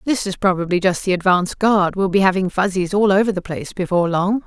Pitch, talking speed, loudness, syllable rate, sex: 190 Hz, 230 wpm, -18 LUFS, 6.2 syllables/s, female